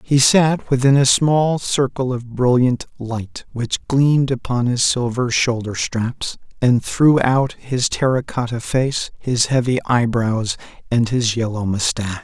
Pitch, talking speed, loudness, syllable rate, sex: 125 Hz, 145 wpm, -18 LUFS, 4.0 syllables/s, male